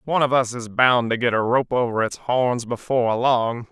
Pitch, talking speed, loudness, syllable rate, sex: 120 Hz, 225 wpm, -20 LUFS, 5.0 syllables/s, male